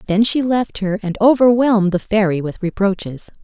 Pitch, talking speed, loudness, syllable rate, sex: 210 Hz, 175 wpm, -16 LUFS, 5.1 syllables/s, female